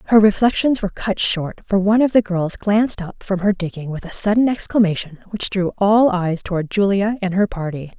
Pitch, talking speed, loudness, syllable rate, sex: 195 Hz, 210 wpm, -18 LUFS, 5.5 syllables/s, female